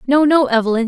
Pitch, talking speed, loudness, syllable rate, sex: 255 Hz, 205 wpm, -14 LUFS, 6.4 syllables/s, female